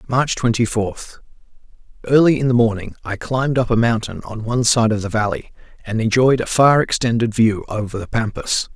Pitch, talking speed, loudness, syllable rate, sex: 115 Hz, 180 wpm, -18 LUFS, 5.4 syllables/s, male